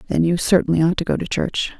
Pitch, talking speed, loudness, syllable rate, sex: 170 Hz, 265 wpm, -19 LUFS, 6.5 syllables/s, female